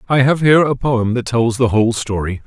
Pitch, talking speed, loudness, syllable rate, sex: 120 Hz, 245 wpm, -15 LUFS, 5.8 syllables/s, male